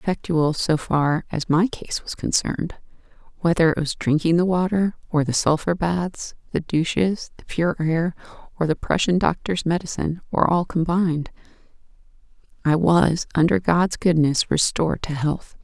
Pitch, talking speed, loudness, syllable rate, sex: 165 Hz, 150 wpm, -21 LUFS, 4.7 syllables/s, female